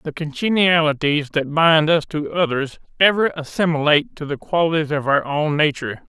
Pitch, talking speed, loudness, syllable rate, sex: 155 Hz, 155 wpm, -18 LUFS, 5.3 syllables/s, male